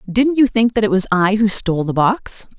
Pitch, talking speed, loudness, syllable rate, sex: 210 Hz, 255 wpm, -16 LUFS, 5.2 syllables/s, female